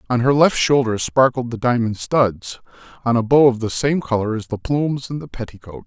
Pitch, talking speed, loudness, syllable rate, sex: 120 Hz, 215 wpm, -18 LUFS, 5.4 syllables/s, male